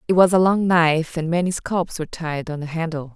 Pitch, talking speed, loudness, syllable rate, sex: 165 Hz, 245 wpm, -20 LUFS, 5.7 syllables/s, female